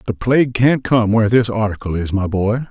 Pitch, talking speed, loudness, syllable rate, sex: 110 Hz, 220 wpm, -16 LUFS, 5.5 syllables/s, male